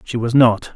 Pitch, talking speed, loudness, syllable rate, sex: 120 Hz, 240 wpm, -15 LUFS, 4.6 syllables/s, male